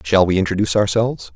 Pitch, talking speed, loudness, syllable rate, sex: 100 Hz, 180 wpm, -17 LUFS, 7.2 syllables/s, male